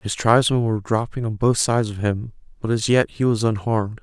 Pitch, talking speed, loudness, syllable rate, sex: 110 Hz, 225 wpm, -20 LUFS, 6.0 syllables/s, male